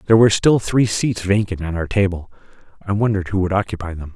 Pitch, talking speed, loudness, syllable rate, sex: 100 Hz, 215 wpm, -18 LUFS, 6.6 syllables/s, male